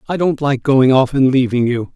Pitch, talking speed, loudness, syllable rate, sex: 130 Hz, 245 wpm, -14 LUFS, 5.1 syllables/s, male